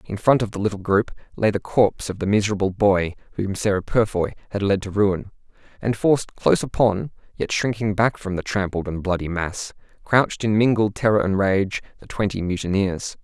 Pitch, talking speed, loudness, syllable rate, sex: 100 Hz, 190 wpm, -22 LUFS, 5.4 syllables/s, male